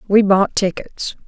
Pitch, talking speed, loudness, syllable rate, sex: 195 Hz, 140 wpm, -17 LUFS, 3.9 syllables/s, female